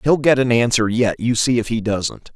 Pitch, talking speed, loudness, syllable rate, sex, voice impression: 115 Hz, 255 wpm, -18 LUFS, 5.0 syllables/s, male, masculine, very adult-like, slightly fluent, intellectual, slightly mature, slightly sweet